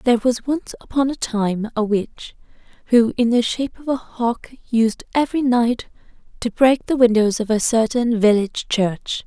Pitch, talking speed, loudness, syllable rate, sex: 235 Hz, 175 wpm, -19 LUFS, 4.6 syllables/s, female